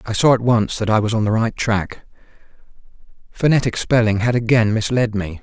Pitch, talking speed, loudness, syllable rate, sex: 110 Hz, 190 wpm, -17 LUFS, 5.5 syllables/s, male